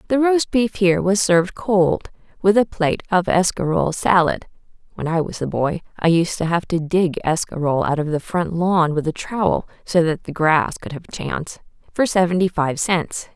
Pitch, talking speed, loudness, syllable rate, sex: 175 Hz, 200 wpm, -19 LUFS, 4.9 syllables/s, female